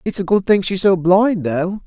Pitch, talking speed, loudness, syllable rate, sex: 190 Hz, 260 wpm, -16 LUFS, 4.6 syllables/s, male